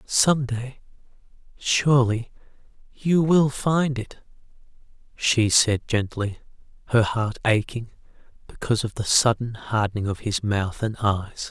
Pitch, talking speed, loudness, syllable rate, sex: 115 Hz, 110 wpm, -22 LUFS, 4.0 syllables/s, male